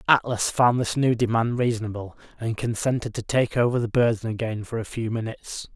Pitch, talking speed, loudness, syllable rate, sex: 115 Hz, 190 wpm, -24 LUFS, 5.6 syllables/s, male